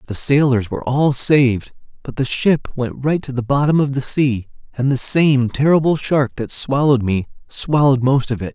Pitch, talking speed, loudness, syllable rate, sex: 130 Hz, 195 wpm, -17 LUFS, 5.0 syllables/s, male